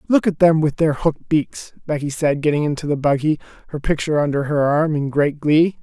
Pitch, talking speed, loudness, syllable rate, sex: 150 Hz, 215 wpm, -19 LUFS, 5.6 syllables/s, male